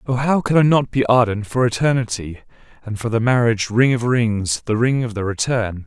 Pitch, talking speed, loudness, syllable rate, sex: 120 Hz, 205 wpm, -18 LUFS, 5.4 syllables/s, male